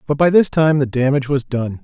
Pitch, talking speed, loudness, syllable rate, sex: 140 Hz, 260 wpm, -16 LUFS, 5.9 syllables/s, male